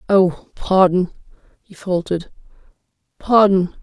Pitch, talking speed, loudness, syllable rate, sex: 185 Hz, 80 wpm, -17 LUFS, 4.2 syllables/s, female